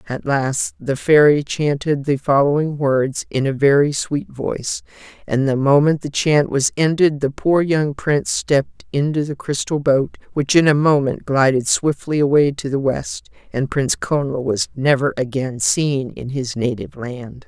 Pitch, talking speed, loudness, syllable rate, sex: 140 Hz, 170 wpm, -18 LUFS, 4.4 syllables/s, female